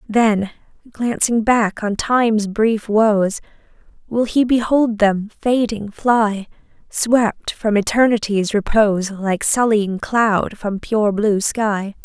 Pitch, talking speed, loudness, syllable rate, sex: 215 Hz, 120 wpm, -17 LUFS, 3.3 syllables/s, female